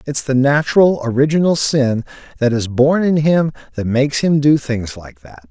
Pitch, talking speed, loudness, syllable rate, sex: 135 Hz, 185 wpm, -15 LUFS, 4.8 syllables/s, male